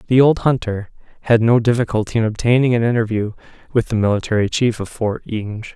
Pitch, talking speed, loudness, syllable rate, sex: 115 Hz, 175 wpm, -18 LUFS, 6.0 syllables/s, male